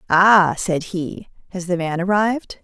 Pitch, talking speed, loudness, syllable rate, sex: 185 Hz, 160 wpm, -18 LUFS, 4.2 syllables/s, female